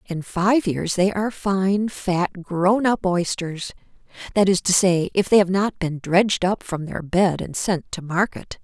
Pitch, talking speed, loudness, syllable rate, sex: 185 Hz, 190 wpm, -21 LUFS, 4.1 syllables/s, female